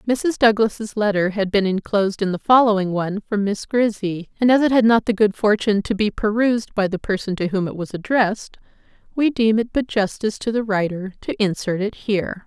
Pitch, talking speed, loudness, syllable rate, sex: 210 Hz, 210 wpm, -20 LUFS, 5.6 syllables/s, female